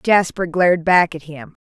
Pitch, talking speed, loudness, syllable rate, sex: 170 Hz, 180 wpm, -16 LUFS, 4.6 syllables/s, female